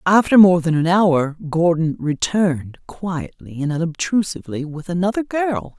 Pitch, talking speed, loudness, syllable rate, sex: 170 Hz, 135 wpm, -18 LUFS, 4.6 syllables/s, female